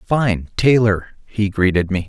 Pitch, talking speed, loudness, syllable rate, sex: 105 Hz, 145 wpm, -17 LUFS, 3.8 syllables/s, male